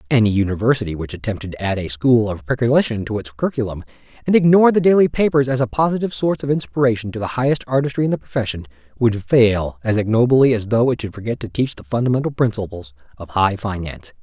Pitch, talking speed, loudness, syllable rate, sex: 115 Hz, 200 wpm, -18 LUFS, 6.8 syllables/s, male